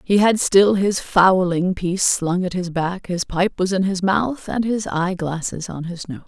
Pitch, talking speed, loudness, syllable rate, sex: 185 Hz, 220 wpm, -19 LUFS, 4.3 syllables/s, female